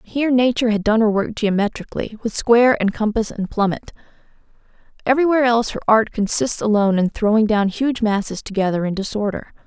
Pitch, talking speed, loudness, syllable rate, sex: 220 Hz, 170 wpm, -18 LUFS, 6.3 syllables/s, female